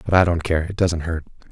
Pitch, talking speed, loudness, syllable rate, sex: 85 Hz, 280 wpm, -21 LUFS, 6.0 syllables/s, male